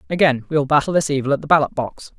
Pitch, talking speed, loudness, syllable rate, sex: 145 Hz, 275 wpm, -18 LUFS, 7.3 syllables/s, male